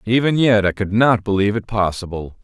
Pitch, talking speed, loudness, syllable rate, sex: 105 Hz, 200 wpm, -17 LUFS, 5.7 syllables/s, male